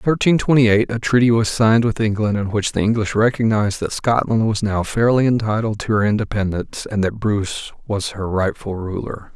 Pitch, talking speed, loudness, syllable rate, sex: 110 Hz, 200 wpm, -18 LUFS, 5.7 syllables/s, male